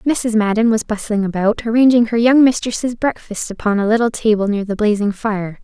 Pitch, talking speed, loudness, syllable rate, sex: 220 Hz, 190 wpm, -16 LUFS, 5.2 syllables/s, female